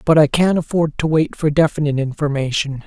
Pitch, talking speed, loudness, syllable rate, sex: 150 Hz, 190 wpm, -17 LUFS, 5.8 syllables/s, male